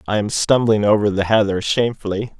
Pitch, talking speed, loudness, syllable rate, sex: 105 Hz, 175 wpm, -17 LUFS, 5.9 syllables/s, male